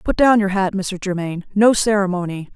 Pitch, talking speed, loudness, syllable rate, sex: 195 Hz, 190 wpm, -18 LUFS, 5.6 syllables/s, female